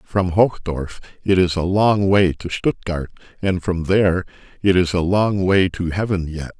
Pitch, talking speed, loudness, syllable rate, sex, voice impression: 90 Hz, 180 wpm, -19 LUFS, 4.4 syllables/s, male, very masculine, very adult-like, thick, cool, slightly calm, wild, slightly kind